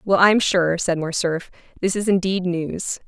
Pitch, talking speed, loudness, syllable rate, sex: 180 Hz, 175 wpm, -20 LUFS, 4.2 syllables/s, female